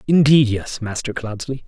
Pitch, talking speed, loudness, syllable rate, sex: 125 Hz, 145 wpm, -19 LUFS, 5.3 syllables/s, male